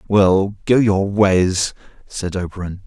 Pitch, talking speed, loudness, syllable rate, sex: 95 Hz, 125 wpm, -17 LUFS, 3.5 syllables/s, male